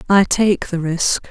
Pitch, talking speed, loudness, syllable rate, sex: 185 Hz, 185 wpm, -17 LUFS, 3.7 syllables/s, female